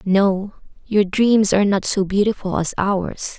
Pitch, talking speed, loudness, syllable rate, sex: 195 Hz, 160 wpm, -18 LUFS, 4.1 syllables/s, female